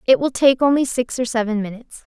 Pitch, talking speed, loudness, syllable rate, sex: 240 Hz, 220 wpm, -18 LUFS, 6.3 syllables/s, female